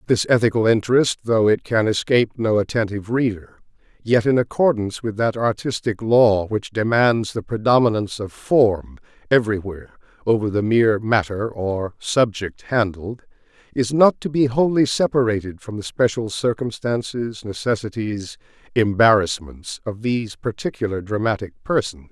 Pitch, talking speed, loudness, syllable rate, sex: 110 Hz, 130 wpm, -20 LUFS, 4.9 syllables/s, male